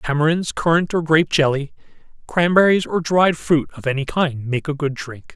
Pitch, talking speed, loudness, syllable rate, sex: 155 Hz, 180 wpm, -18 LUFS, 5.1 syllables/s, male